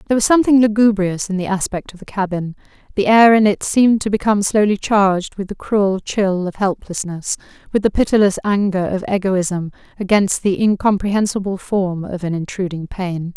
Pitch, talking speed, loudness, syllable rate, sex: 195 Hz, 175 wpm, -17 LUFS, 5.4 syllables/s, female